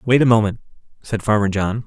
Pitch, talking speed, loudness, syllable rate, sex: 110 Hz, 195 wpm, -18 LUFS, 5.6 syllables/s, male